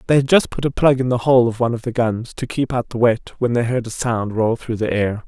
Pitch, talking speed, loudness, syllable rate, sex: 120 Hz, 320 wpm, -19 LUFS, 5.8 syllables/s, male